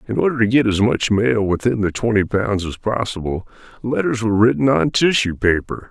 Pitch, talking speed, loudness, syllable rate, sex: 110 Hz, 195 wpm, -18 LUFS, 5.4 syllables/s, male